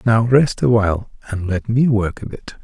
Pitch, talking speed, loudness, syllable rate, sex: 110 Hz, 205 wpm, -17 LUFS, 4.8 syllables/s, male